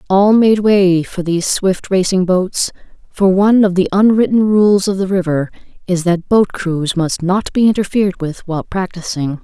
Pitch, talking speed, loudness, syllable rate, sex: 190 Hz, 180 wpm, -14 LUFS, 4.7 syllables/s, female